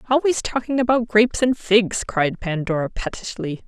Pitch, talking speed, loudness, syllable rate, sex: 215 Hz, 145 wpm, -20 LUFS, 5.0 syllables/s, female